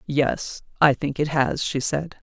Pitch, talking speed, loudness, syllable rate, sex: 145 Hz, 180 wpm, -23 LUFS, 3.7 syllables/s, female